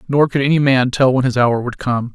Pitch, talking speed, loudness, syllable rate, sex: 130 Hz, 280 wpm, -15 LUFS, 5.5 syllables/s, male